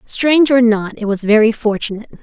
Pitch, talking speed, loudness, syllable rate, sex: 225 Hz, 190 wpm, -14 LUFS, 6.1 syllables/s, female